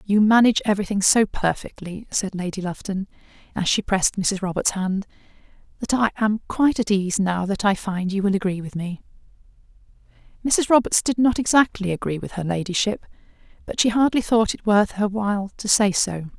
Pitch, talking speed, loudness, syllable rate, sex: 200 Hz, 180 wpm, -21 LUFS, 5.5 syllables/s, female